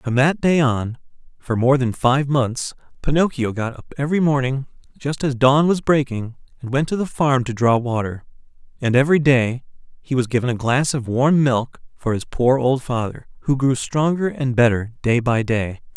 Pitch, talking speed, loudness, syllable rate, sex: 130 Hz, 190 wpm, -19 LUFS, 4.9 syllables/s, male